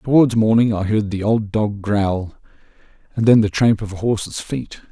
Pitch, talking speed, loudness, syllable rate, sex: 105 Hz, 195 wpm, -18 LUFS, 4.8 syllables/s, male